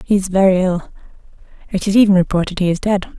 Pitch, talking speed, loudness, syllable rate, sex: 190 Hz, 190 wpm, -16 LUFS, 6.6 syllables/s, female